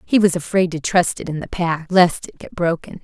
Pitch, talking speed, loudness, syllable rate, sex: 175 Hz, 255 wpm, -19 LUFS, 5.2 syllables/s, female